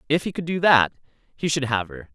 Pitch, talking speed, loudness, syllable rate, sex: 140 Hz, 250 wpm, -22 LUFS, 5.8 syllables/s, male